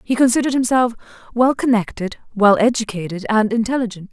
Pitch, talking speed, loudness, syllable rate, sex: 230 Hz, 130 wpm, -18 LUFS, 6.1 syllables/s, female